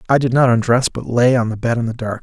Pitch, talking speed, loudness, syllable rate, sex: 120 Hz, 325 wpm, -16 LUFS, 6.3 syllables/s, male